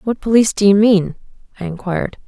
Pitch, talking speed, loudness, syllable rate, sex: 200 Hz, 185 wpm, -15 LUFS, 6.6 syllables/s, female